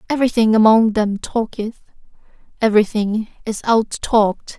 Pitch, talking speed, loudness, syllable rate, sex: 220 Hz, 105 wpm, -17 LUFS, 5.1 syllables/s, female